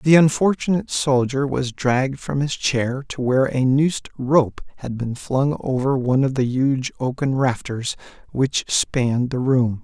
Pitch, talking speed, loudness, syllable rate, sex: 135 Hz, 165 wpm, -20 LUFS, 4.5 syllables/s, male